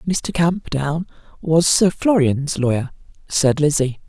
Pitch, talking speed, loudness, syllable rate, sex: 155 Hz, 120 wpm, -18 LUFS, 4.1 syllables/s, female